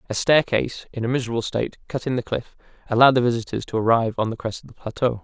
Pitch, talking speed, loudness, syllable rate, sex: 120 Hz, 240 wpm, -22 LUFS, 7.5 syllables/s, male